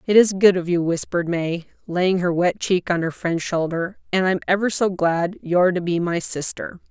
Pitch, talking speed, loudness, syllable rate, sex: 180 Hz, 215 wpm, -21 LUFS, 5.0 syllables/s, female